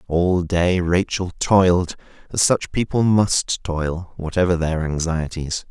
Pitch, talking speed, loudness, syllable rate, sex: 85 Hz, 125 wpm, -20 LUFS, 3.8 syllables/s, male